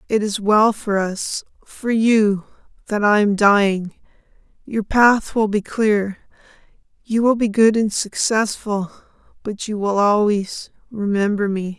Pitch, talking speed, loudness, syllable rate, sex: 210 Hz, 110 wpm, -18 LUFS, 3.9 syllables/s, female